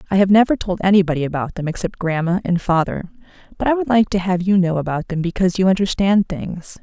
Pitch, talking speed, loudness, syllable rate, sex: 185 Hz, 220 wpm, -18 LUFS, 6.3 syllables/s, female